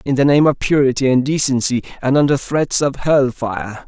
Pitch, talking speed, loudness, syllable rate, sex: 135 Hz, 200 wpm, -16 LUFS, 5.0 syllables/s, male